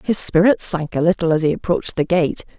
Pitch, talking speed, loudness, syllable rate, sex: 170 Hz, 230 wpm, -18 LUFS, 5.9 syllables/s, female